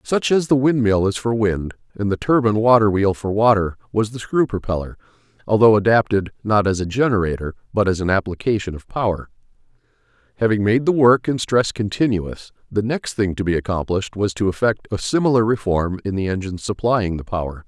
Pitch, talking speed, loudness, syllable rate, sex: 105 Hz, 185 wpm, -19 LUFS, 5.7 syllables/s, male